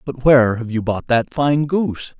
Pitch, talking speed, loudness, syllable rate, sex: 130 Hz, 220 wpm, -17 LUFS, 4.8 syllables/s, male